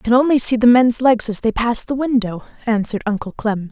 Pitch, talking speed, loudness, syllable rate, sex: 235 Hz, 240 wpm, -17 LUFS, 6.0 syllables/s, female